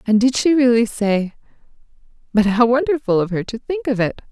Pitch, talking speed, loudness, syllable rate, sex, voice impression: 230 Hz, 180 wpm, -18 LUFS, 5.5 syllables/s, female, feminine, adult-like, intellectual, slightly calm